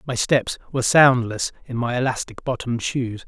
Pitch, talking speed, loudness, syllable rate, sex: 125 Hz, 165 wpm, -21 LUFS, 5.2 syllables/s, male